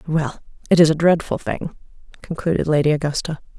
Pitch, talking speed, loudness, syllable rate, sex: 160 Hz, 150 wpm, -19 LUFS, 5.8 syllables/s, female